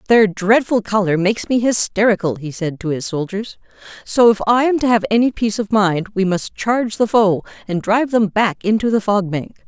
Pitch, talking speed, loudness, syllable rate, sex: 210 Hz, 210 wpm, -17 LUFS, 5.3 syllables/s, female